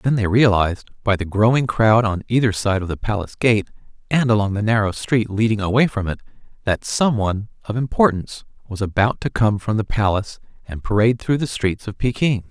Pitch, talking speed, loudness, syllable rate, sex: 110 Hz, 195 wpm, -19 LUFS, 5.8 syllables/s, male